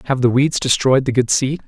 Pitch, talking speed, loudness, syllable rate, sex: 130 Hz, 250 wpm, -16 LUFS, 5.4 syllables/s, male